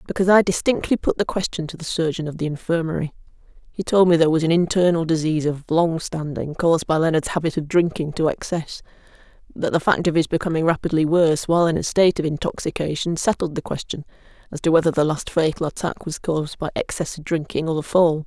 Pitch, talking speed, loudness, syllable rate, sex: 165 Hz, 210 wpm, -21 LUFS, 6.3 syllables/s, female